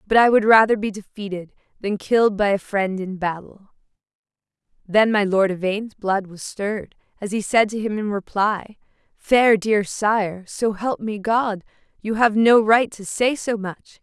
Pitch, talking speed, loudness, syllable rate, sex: 210 Hz, 180 wpm, -20 LUFS, 4.3 syllables/s, female